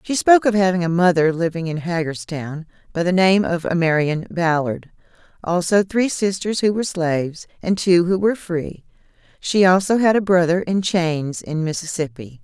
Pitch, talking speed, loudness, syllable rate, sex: 175 Hz, 170 wpm, -19 LUFS, 5.0 syllables/s, female